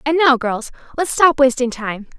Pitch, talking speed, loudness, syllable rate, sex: 265 Hz, 190 wpm, -16 LUFS, 4.8 syllables/s, female